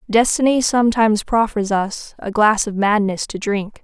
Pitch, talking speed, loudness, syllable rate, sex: 215 Hz, 155 wpm, -17 LUFS, 4.7 syllables/s, female